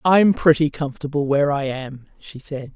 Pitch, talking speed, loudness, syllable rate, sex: 145 Hz, 195 wpm, -19 LUFS, 5.5 syllables/s, female